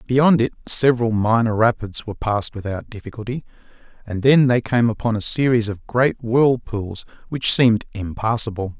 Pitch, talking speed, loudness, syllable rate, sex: 115 Hz, 150 wpm, -19 LUFS, 5.1 syllables/s, male